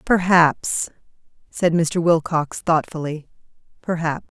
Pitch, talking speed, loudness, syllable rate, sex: 165 Hz, 70 wpm, -20 LUFS, 3.6 syllables/s, female